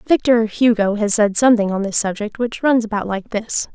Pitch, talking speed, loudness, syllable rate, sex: 220 Hz, 210 wpm, -17 LUFS, 5.3 syllables/s, female